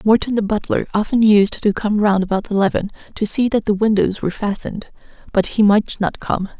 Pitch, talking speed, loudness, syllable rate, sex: 205 Hz, 200 wpm, -18 LUFS, 5.6 syllables/s, female